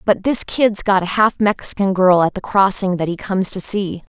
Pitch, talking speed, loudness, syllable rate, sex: 195 Hz, 230 wpm, -17 LUFS, 5.1 syllables/s, female